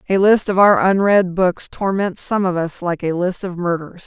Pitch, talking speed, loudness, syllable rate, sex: 185 Hz, 220 wpm, -17 LUFS, 4.7 syllables/s, female